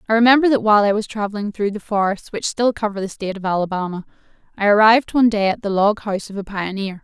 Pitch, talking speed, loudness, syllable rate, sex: 210 Hz, 240 wpm, -18 LUFS, 6.9 syllables/s, female